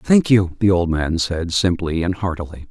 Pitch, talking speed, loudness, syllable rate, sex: 90 Hz, 200 wpm, -18 LUFS, 4.6 syllables/s, male